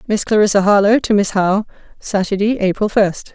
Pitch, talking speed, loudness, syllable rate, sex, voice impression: 205 Hz, 160 wpm, -15 LUFS, 5.9 syllables/s, female, feminine, adult-like, slightly intellectual, slightly kind